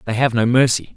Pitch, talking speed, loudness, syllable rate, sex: 120 Hz, 250 wpm, -16 LUFS, 6.2 syllables/s, male